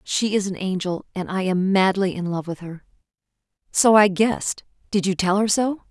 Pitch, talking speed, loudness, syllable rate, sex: 195 Hz, 205 wpm, -21 LUFS, 5.1 syllables/s, female